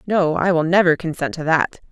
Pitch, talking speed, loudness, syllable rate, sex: 170 Hz, 220 wpm, -18 LUFS, 5.3 syllables/s, female